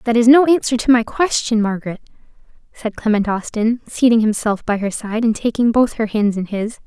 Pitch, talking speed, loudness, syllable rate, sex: 225 Hz, 200 wpm, -17 LUFS, 5.4 syllables/s, female